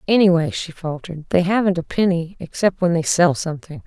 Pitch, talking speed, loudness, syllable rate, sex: 175 Hz, 185 wpm, -19 LUFS, 5.8 syllables/s, female